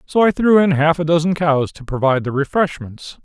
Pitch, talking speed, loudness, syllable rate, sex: 160 Hz, 220 wpm, -16 LUFS, 5.5 syllables/s, male